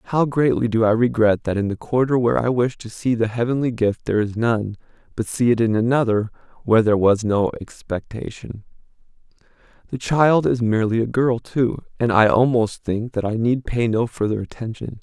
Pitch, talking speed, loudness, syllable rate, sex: 115 Hz, 190 wpm, -20 LUFS, 5.4 syllables/s, male